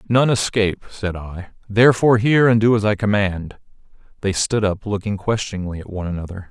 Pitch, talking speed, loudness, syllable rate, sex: 105 Hz, 175 wpm, -19 LUFS, 5.9 syllables/s, male